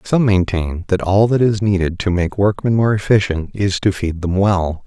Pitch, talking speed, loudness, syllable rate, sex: 100 Hz, 210 wpm, -17 LUFS, 4.7 syllables/s, male